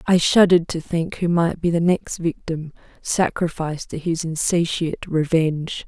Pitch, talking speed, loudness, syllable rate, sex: 165 Hz, 155 wpm, -21 LUFS, 4.9 syllables/s, female